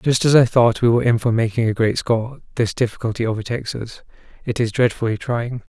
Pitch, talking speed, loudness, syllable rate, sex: 115 Hz, 200 wpm, -19 LUFS, 6.2 syllables/s, male